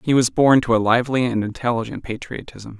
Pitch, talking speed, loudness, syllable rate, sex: 120 Hz, 195 wpm, -19 LUFS, 6.0 syllables/s, male